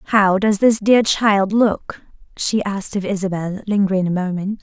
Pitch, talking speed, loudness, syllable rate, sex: 200 Hz, 170 wpm, -18 LUFS, 4.5 syllables/s, female